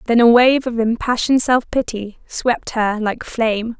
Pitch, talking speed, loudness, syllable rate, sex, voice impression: 235 Hz, 175 wpm, -17 LUFS, 4.5 syllables/s, female, very feminine, slightly young, slightly adult-like, thin, tensed, powerful, bright, slightly hard, very clear, fluent, cute, intellectual, very refreshing, sincere, calm, friendly, reassuring, slightly unique, wild, sweet, lively, slightly strict, slightly intense